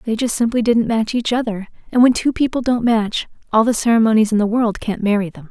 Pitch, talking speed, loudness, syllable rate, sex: 225 Hz, 240 wpm, -17 LUFS, 5.9 syllables/s, female